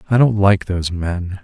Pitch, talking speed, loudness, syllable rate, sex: 100 Hz, 210 wpm, -17 LUFS, 5.0 syllables/s, male